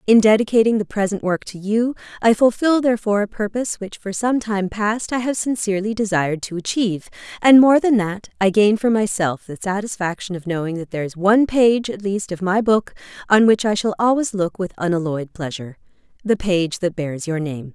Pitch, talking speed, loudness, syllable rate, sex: 200 Hz, 200 wpm, -19 LUFS, 5.6 syllables/s, female